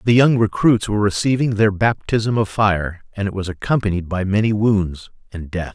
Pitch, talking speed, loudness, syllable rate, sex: 100 Hz, 190 wpm, -18 LUFS, 5.1 syllables/s, male